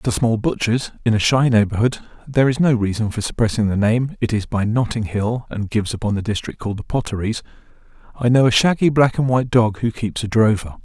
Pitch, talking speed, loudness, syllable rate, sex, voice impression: 115 Hz, 225 wpm, -19 LUFS, 3.5 syllables/s, male, very masculine, very adult-like, old, very thick, very relaxed, very weak, dark, soft, very muffled, slightly fluent, very raspy, cool, very intellectual, very sincere, very calm, very mature, friendly, very reassuring, elegant, slightly wild, very sweet, very kind, modest